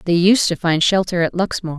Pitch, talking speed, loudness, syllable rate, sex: 175 Hz, 235 wpm, -17 LUFS, 6.1 syllables/s, female